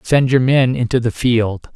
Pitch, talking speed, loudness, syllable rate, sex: 125 Hz, 205 wpm, -16 LUFS, 4.2 syllables/s, male